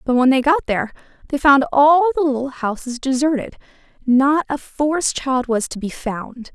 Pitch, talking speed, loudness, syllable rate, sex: 270 Hz, 185 wpm, -18 LUFS, 4.9 syllables/s, female